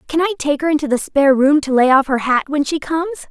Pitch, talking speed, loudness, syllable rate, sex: 290 Hz, 290 wpm, -16 LUFS, 6.2 syllables/s, female